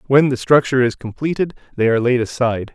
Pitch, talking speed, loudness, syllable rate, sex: 125 Hz, 195 wpm, -17 LUFS, 6.8 syllables/s, male